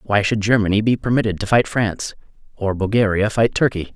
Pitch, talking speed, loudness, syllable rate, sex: 105 Hz, 180 wpm, -18 LUFS, 5.8 syllables/s, male